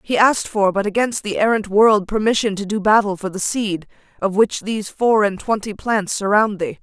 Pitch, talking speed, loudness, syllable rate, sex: 210 Hz, 210 wpm, -18 LUFS, 5.2 syllables/s, female